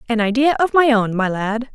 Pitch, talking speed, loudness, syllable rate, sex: 235 Hz, 240 wpm, -17 LUFS, 5.4 syllables/s, female